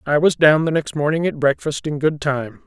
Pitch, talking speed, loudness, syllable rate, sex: 150 Hz, 250 wpm, -18 LUFS, 5.1 syllables/s, male